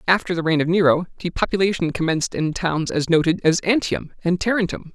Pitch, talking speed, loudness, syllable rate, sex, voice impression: 175 Hz, 180 wpm, -20 LUFS, 5.9 syllables/s, male, masculine, adult-like, tensed, powerful, bright, clear, friendly, unique, slightly wild, lively, intense